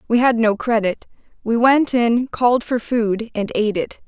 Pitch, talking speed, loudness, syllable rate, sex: 230 Hz, 190 wpm, -18 LUFS, 4.7 syllables/s, female